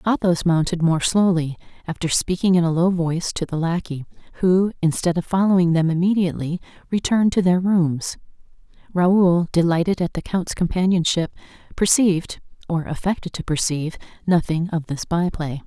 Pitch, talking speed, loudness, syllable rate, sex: 175 Hz, 145 wpm, -20 LUFS, 5.3 syllables/s, female